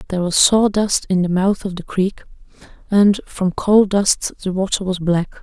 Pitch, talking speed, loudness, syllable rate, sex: 190 Hz, 190 wpm, -17 LUFS, 4.5 syllables/s, female